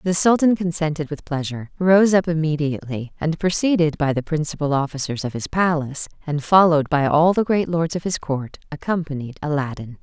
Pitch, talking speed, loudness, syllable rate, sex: 155 Hz, 175 wpm, -20 LUFS, 5.6 syllables/s, female